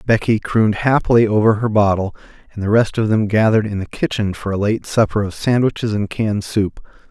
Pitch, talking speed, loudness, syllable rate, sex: 105 Hz, 205 wpm, -17 LUFS, 5.8 syllables/s, male